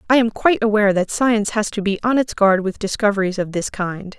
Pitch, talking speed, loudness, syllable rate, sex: 210 Hz, 245 wpm, -18 LUFS, 6.1 syllables/s, female